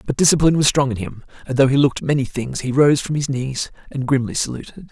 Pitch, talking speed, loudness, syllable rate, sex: 135 Hz, 245 wpm, -18 LUFS, 6.4 syllables/s, male